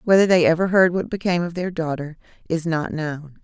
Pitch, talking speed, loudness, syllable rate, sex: 170 Hz, 210 wpm, -20 LUFS, 5.7 syllables/s, female